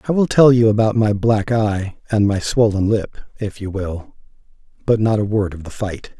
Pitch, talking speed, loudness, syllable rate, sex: 105 Hz, 215 wpm, -18 LUFS, 4.8 syllables/s, male